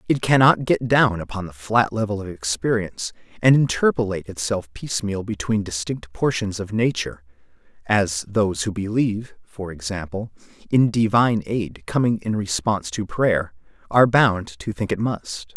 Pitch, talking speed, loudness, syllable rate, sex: 105 Hz, 150 wpm, -21 LUFS, 5.0 syllables/s, male